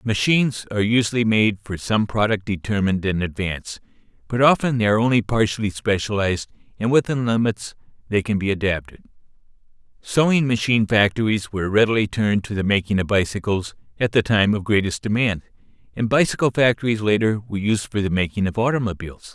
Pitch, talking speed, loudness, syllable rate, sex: 105 Hz, 160 wpm, -20 LUFS, 6.1 syllables/s, male